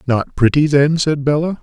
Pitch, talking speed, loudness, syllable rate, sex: 145 Hz, 185 wpm, -15 LUFS, 4.8 syllables/s, male